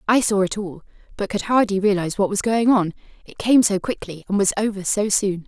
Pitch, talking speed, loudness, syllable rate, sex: 200 Hz, 230 wpm, -20 LUFS, 5.7 syllables/s, female